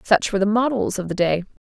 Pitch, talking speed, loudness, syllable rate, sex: 200 Hz, 260 wpm, -20 LUFS, 6.5 syllables/s, female